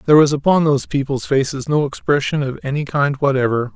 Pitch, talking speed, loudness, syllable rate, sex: 140 Hz, 190 wpm, -17 LUFS, 6.2 syllables/s, male